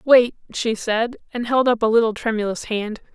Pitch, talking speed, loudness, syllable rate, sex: 230 Hz, 190 wpm, -20 LUFS, 4.9 syllables/s, female